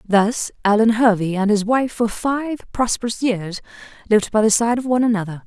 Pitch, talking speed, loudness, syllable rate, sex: 220 Hz, 185 wpm, -18 LUFS, 5.2 syllables/s, female